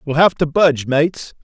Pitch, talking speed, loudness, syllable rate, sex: 155 Hz, 210 wpm, -16 LUFS, 5.7 syllables/s, male